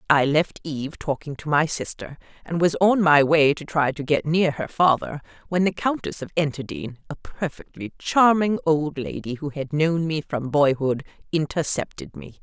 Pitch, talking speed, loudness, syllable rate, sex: 155 Hz, 180 wpm, -22 LUFS, 4.7 syllables/s, female